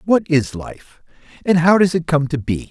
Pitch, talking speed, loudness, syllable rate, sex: 155 Hz, 220 wpm, -17 LUFS, 4.6 syllables/s, male